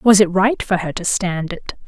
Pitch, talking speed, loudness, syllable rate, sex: 190 Hz, 255 wpm, -18 LUFS, 4.6 syllables/s, female